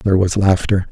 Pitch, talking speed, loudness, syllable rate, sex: 95 Hz, 195 wpm, -16 LUFS, 5.8 syllables/s, male